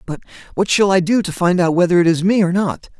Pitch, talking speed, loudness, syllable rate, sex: 180 Hz, 280 wpm, -16 LUFS, 6.2 syllables/s, male